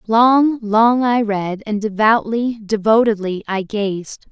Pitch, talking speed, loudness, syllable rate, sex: 215 Hz, 95 wpm, -16 LUFS, 3.5 syllables/s, female